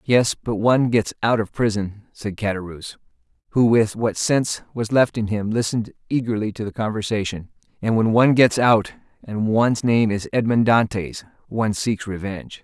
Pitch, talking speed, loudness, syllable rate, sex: 110 Hz, 165 wpm, -20 LUFS, 5.2 syllables/s, male